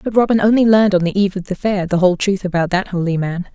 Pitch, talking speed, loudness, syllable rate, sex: 190 Hz, 290 wpm, -16 LUFS, 7.1 syllables/s, female